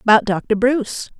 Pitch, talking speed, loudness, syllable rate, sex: 225 Hz, 150 wpm, -18 LUFS, 5.0 syllables/s, female